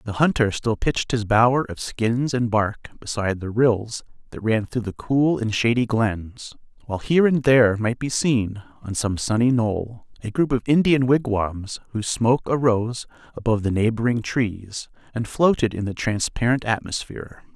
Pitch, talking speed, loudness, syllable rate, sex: 115 Hz, 170 wpm, -22 LUFS, 4.9 syllables/s, male